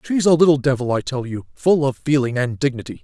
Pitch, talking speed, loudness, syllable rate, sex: 140 Hz, 235 wpm, -19 LUFS, 6.1 syllables/s, male